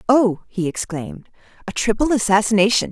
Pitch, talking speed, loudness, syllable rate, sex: 215 Hz, 125 wpm, -19 LUFS, 5.4 syllables/s, female